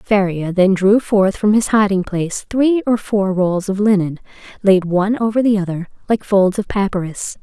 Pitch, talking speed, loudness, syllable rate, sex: 200 Hz, 185 wpm, -16 LUFS, 4.8 syllables/s, female